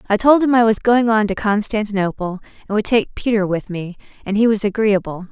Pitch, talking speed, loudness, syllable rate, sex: 210 Hz, 215 wpm, -17 LUFS, 5.7 syllables/s, female